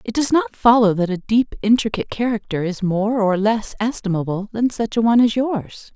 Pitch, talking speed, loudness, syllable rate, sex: 220 Hz, 200 wpm, -19 LUFS, 5.3 syllables/s, female